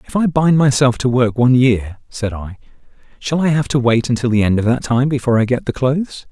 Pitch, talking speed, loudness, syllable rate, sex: 125 Hz, 245 wpm, -16 LUFS, 5.8 syllables/s, male